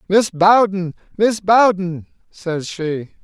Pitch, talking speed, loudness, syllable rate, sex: 190 Hz, 110 wpm, -17 LUFS, 3.1 syllables/s, male